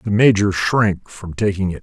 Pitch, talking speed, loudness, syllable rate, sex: 100 Hz, 200 wpm, -17 LUFS, 4.7 syllables/s, male